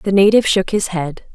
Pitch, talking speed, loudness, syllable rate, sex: 190 Hz, 225 wpm, -15 LUFS, 5.4 syllables/s, female